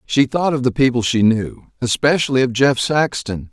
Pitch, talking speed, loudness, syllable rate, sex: 130 Hz, 190 wpm, -17 LUFS, 4.9 syllables/s, male